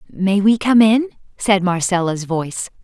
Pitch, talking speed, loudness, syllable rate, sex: 200 Hz, 150 wpm, -16 LUFS, 4.4 syllables/s, female